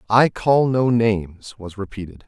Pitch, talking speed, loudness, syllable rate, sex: 105 Hz, 160 wpm, -19 LUFS, 4.4 syllables/s, male